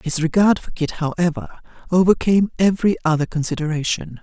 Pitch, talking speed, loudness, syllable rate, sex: 170 Hz, 130 wpm, -19 LUFS, 5.9 syllables/s, male